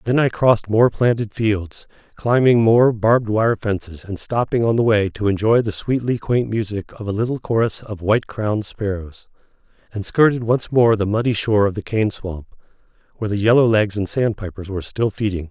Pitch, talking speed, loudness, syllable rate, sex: 110 Hz, 180 wpm, -19 LUFS, 5.4 syllables/s, male